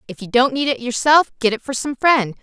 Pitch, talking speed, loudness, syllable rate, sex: 250 Hz, 270 wpm, -17 LUFS, 5.6 syllables/s, female